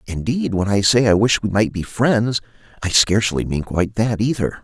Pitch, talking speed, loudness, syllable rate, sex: 105 Hz, 205 wpm, -18 LUFS, 5.2 syllables/s, male